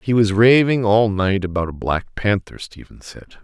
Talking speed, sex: 190 wpm, male